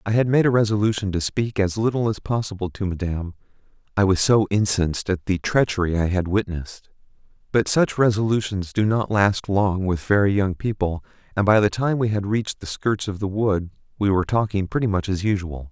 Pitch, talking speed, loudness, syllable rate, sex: 100 Hz, 200 wpm, -22 LUFS, 5.6 syllables/s, male